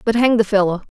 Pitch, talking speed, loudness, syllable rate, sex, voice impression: 215 Hz, 260 wpm, -16 LUFS, 6.8 syllables/s, female, feminine, adult-like, tensed, slightly muffled, raspy, nasal, slightly friendly, unique, lively, slightly strict, slightly sharp